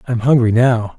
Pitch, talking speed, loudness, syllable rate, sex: 120 Hz, 185 wpm, -14 LUFS, 4.9 syllables/s, male